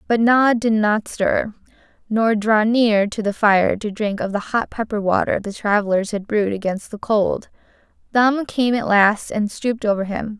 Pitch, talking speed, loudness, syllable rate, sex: 215 Hz, 190 wpm, -19 LUFS, 4.5 syllables/s, female